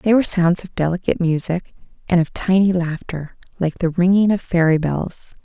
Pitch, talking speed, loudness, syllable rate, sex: 175 Hz, 175 wpm, -19 LUFS, 5.3 syllables/s, female